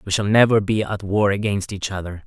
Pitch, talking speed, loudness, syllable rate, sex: 100 Hz, 240 wpm, -20 LUFS, 5.6 syllables/s, male